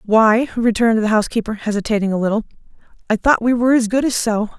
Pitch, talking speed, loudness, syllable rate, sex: 225 Hz, 195 wpm, -17 LUFS, 6.8 syllables/s, female